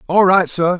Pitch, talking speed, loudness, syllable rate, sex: 180 Hz, 225 wpm, -14 LUFS, 4.9 syllables/s, male